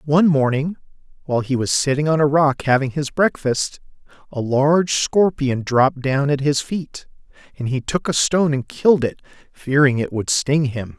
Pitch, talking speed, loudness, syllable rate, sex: 140 Hz, 180 wpm, -19 LUFS, 5.0 syllables/s, male